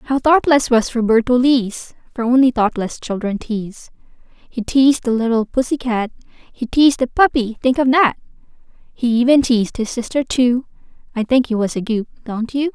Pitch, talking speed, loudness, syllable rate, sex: 245 Hz, 170 wpm, -17 LUFS, 4.6 syllables/s, female